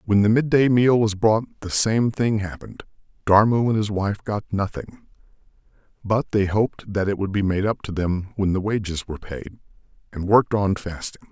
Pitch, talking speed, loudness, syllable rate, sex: 105 Hz, 190 wpm, -21 LUFS, 5.3 syllables/s, male